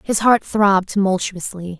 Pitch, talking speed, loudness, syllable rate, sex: 195 Hz, 135 wpm, -17 LUFS, 4.7 syllables/s, female